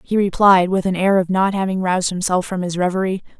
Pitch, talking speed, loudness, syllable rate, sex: 185 Hz, 230 wpm, -18 LUFS, 6.0 syllables/s, female